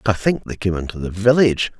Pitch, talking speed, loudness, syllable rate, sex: 100 Hz, 235 wpm, -19 LUFS, 6.1 syllables/s, male